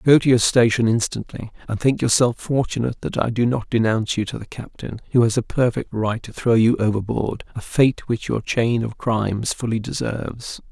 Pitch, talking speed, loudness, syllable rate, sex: 115 Hz, 195 wpm, -20 LUFS, 5.2 syllables/s, male